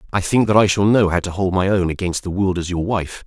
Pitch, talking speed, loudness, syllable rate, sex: 95 Hz, 315 wpm, -18 LUFS, 6.0 syllables/s, male